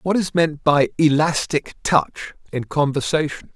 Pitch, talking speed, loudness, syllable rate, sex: 150 Hz, 135 wpm, -20 LUFS, 4.1 syllables/s, male